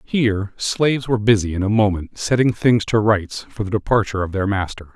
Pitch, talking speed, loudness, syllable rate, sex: 105 Hz, 205 wpm, -19 LUFS, 5.6 syllables/s, male